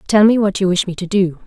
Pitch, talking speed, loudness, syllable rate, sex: 195 Hz, 325 wpm, -15 LUFS, 6.3 syllables/s, female